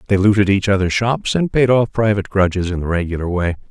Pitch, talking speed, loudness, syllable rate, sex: 100 Hz, 225 wpm, -17 LUFS, 6.2 syllables/s, male